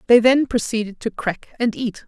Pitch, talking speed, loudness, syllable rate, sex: 230 Hz, 200 wpm, -20 LUFS, 4.9 syllables/s, female